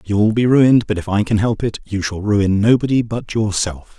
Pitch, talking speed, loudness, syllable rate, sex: 105 Hz, 225 wpm, -17 LUFS, 5.0 syllables/s, male